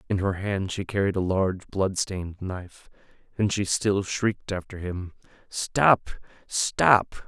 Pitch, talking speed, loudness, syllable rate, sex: 95 Hz, 150 wpm, -25 LUFS, 4.3 syllables/s, male